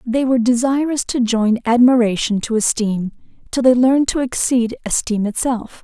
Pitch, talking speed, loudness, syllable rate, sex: 240 Hz, 155 wpm, -17 LUFS, 5.0 syllables/s, female